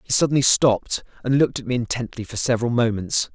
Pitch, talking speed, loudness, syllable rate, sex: 120 Hz, 195 wpm, -21 LUFS, 6.6 syllables/s, male